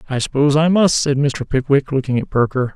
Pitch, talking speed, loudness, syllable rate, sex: 140 Hz, 220 wpm, -17 LUFS, 5.9 syllables/s, male